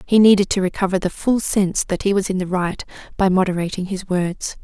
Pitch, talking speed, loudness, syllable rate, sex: 190 Hz, 220 wpm, -19 LUFS, 5.8 syllables/s, female